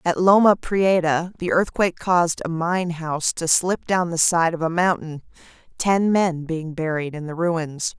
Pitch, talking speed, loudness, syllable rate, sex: 170 Hz, 180 wpm, -21 LUFS, 4.4 syllables/s, female